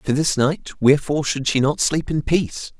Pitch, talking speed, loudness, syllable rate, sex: 145 Hz, 215 wpm, -20 LUFS, 5.5 syllables/s, male